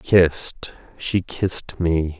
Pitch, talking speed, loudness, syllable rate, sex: 85 Hz, 110 wpm, -22 LUFS, 3.1 syllables/s, male